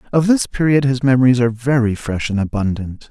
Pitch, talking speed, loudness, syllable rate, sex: 125 Hz, 195 wpm, -16 LUFS, 6.0 syllables/s, male